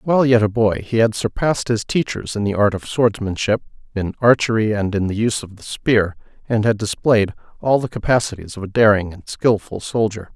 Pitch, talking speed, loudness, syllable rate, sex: 110 Hz, 205 wpm, -19 LUFS, 5.5 syllables/s, male